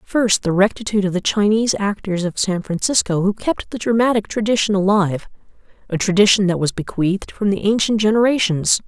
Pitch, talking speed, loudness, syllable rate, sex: 200 Hz, 170 wpm, -18 LUFS, 5.8 syllables/s, female